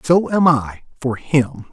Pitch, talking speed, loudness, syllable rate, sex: 140 Hz, 140 wpm, -17 LUFS, 4.2 syllables/s, male